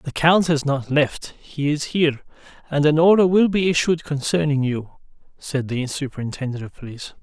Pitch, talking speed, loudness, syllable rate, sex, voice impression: 145 Hz, 175 wpm, -20 LUFS, 5.3 syllables/s, male, masculine, very adult-like, sincere, slightly elegant, slightly kind